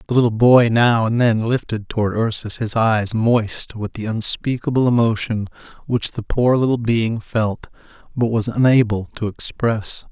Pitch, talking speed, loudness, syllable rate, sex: 115 Hz, 160 wpm, -18 LUFS, 4.4 syllables/s, male